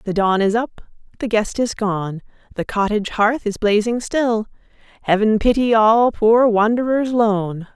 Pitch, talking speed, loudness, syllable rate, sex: 220 Hz, 145 wpm, -18 LUFS, 4.2 syllables/s, female